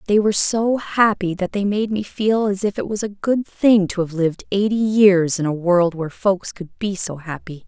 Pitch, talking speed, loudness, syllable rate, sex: 195 Hz, 235 wpm, -19 LUFS, 4.9 syllables/s, female